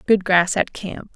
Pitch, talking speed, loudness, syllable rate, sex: 185 Hz, 210 wpm, -18 LUFS, 4.0 syllables/s, female